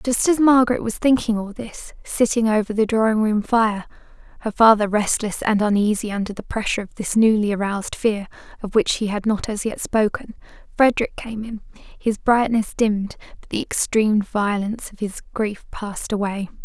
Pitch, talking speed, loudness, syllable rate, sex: 215 Hz, 170 wpm, -20 LUFS, 5.3 syllables/s, female